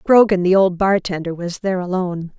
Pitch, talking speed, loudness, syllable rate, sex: 185 Hz, 175 wpm, -18 LUFS, 5.8 syllables/s, female